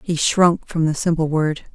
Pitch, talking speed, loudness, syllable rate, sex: 160 Hz, 205 wpm, -19 LUFS, 4.3 syllables/s, female